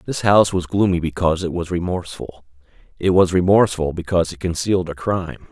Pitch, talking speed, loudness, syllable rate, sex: 90 Hz, 175 wpm, -19 LUFS, 6.4 syllables/s, male